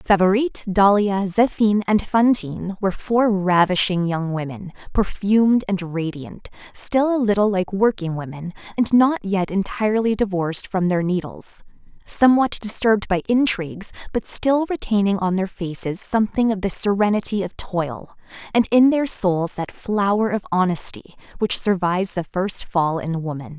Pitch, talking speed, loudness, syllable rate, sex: 195 Hz, 150 wpm, -20 LUFS, 4.8 syllables/s, female